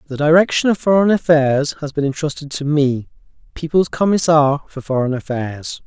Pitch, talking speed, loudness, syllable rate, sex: 150 Hz, 155 wpm, -17 LUFS, 5.0 syllables/s, male